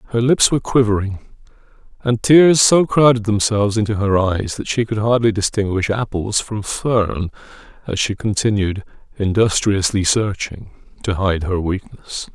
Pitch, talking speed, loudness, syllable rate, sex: 105 Hz, 140 wpm, -17 LUFS, 4.7 syllables/s, male